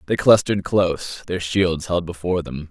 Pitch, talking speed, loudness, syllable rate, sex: 90 Hz, 175 wpm, -20 LUFS, 5.2 syllables/s, male